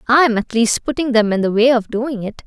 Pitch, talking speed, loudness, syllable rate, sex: 235 Hz, 290 wpm, -16 LUFS, 5.7 syllables/s, female